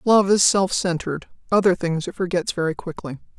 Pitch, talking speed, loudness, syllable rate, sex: 180 Hz, 175 wpm, -21 LUFS, 5.1 syllables/s, female